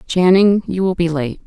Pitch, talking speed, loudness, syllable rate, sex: 180 Hz, 205 wpm, -15 LUFS, 4.7 syllables/s, female